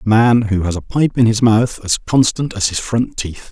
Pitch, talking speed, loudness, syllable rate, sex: 110 Hz, 255 wpm, -15 LUFS, 4.8 syllables/s, male